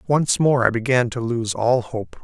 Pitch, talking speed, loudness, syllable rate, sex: 120 Hz, 215 wpm, -20 LUFS, 4.4 syllables/s, male